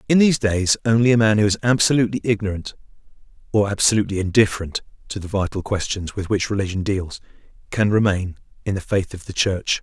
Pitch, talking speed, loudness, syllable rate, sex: 100 Hz, 175 wpm, -20 LUFS, 6.3 syllables/s, male